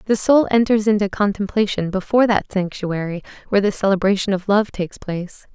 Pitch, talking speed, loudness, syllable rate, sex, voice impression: 200 Hz, 160 wpm, -19 LUFS, 5.9 syllables/s, female, feminine, adult-like, tensed, powerful, soft, clear, slightly fluent, intellectual, elegant, lively, slightly kind